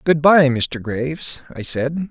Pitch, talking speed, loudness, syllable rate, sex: 145 Hz, 170 wpm, -18 LUFS, 3.9 syllables/s, male